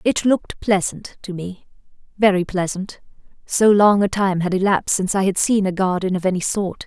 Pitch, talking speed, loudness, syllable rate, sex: 190 Hz, 185 wpm, -19 LUFS, 5.3 syllables/s, female